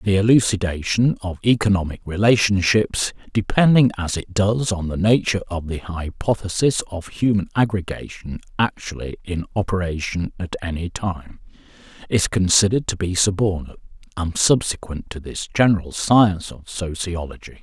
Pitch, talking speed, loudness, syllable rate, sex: 95 Hz, 125 wpm, -20 LUFS, 5.1 syllables/s, male